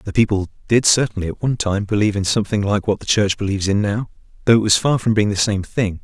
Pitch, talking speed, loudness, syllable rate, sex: 105 Hz, 260 wpm, -18 LUFS, 6.6 syllables/s, male